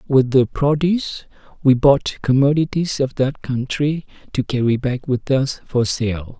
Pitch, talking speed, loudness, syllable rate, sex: 135 Hz, 150 wpm, -19 LUFS, 4.2 syllables/s, male